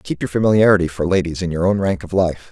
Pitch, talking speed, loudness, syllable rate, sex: 90 Hz, 265 wpm, -17 LUFS, 6.5 syllables/s, male